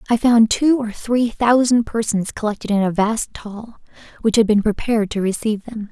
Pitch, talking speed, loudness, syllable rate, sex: 220 Hz, 195 wpm, -18 LUFS, 5.1 syllables/s, female